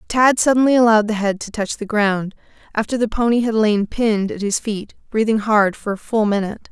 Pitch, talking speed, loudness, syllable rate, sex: 215 Hz, 215 wpm, -18 LUFS, 5.7 syllables/s, female